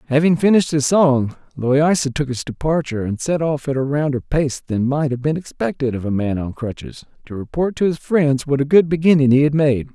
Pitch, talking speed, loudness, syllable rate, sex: 140 Hz, 225 wpm, -18 LUFS, 5.5 syllables/s, male